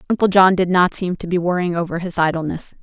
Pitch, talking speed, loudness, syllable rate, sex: 175 Hz, 235 wpm, -18 LUFS, 6.2 syllables/s, female